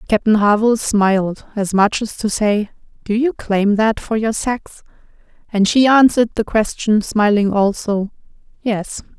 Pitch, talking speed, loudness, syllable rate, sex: 215 Hz, 150 wpm, -16 LUFS, 4.4 syllables/s, female